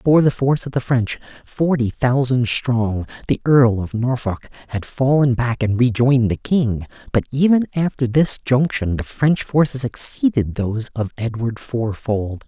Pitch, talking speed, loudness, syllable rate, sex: 125 Hz, 160 wpm, -19 LUFS, 4.6 syllables/s, male